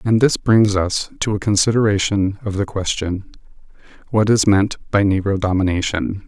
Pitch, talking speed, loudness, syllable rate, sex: 100 Hz, 155 wpm, -18 LUFS, 4.9 syllables/s, male